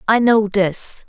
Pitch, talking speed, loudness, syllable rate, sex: 210 Hz, 165 wpm, -16 LUFS, 3.3 syllables/s, female